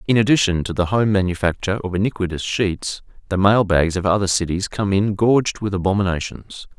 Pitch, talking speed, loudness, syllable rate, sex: 100 Hz, 175 wpm, -19 LUFS, 5.8 syllables/s, male